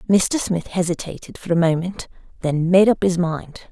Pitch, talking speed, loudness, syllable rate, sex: 175 Hz, 180 wpm, -20 LUFS, 4.8 syllables/s, female